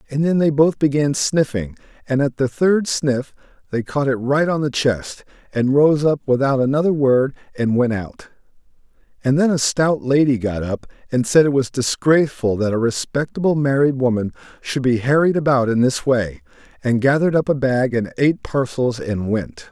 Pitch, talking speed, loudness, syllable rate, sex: 135 Hz, 185 wpm, -18 LUFS, 4.9 syllables/s, male